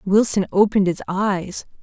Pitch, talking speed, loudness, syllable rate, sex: 195 Hz, 130 wpm, -19 LUFS, 4.7 syllables/s, female